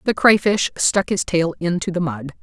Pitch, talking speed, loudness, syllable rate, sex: 170 Hz, 200 wpm, -19 LUFS, 4.6 syllables/s, female